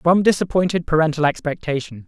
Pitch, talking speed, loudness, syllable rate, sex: 160 Hz, 115 wpm, -19 LUFS, 6.1 syllables/s, male